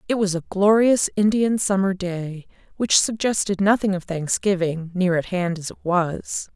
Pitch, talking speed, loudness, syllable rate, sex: 190 Hz, 165 wpm, -21 LUFS, 4.4 syllables/s, female